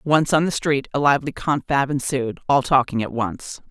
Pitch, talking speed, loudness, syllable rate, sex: 140 Hz, 195 wpm, -20 LUFS, 5.0 syllables/s, female